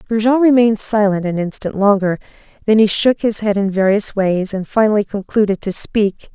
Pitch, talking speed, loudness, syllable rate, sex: 205 Hz, 180 wpm, -15 LUFS, 5.2 syllables/s, female